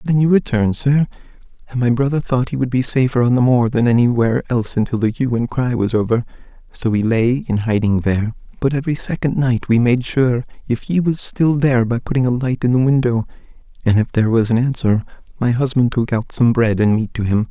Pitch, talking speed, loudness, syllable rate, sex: 120 Hz, 225 wpm, -17 LUFS, 5.9 syllables/s, male